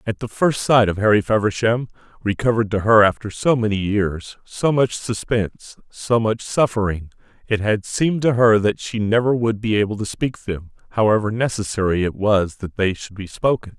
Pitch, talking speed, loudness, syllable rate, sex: 110 Hz, 185 wpm, -19 LUFS, 5.1 syllables/s, male